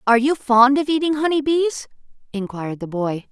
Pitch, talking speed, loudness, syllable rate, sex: 255 Hz, 180 wpm, -19 LUFS, 5.5 syllables/s, female